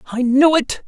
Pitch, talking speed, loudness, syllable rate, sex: 250 Hz, 205 wpm, -15 LUFS, 4.8 syllables/s, male